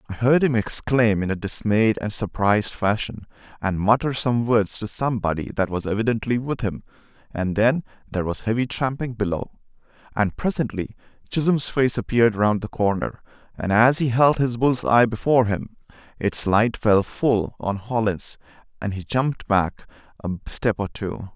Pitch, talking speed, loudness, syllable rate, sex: 110 Hz, 165 wpm, -22 LUFS, 4.9 syllables/s, male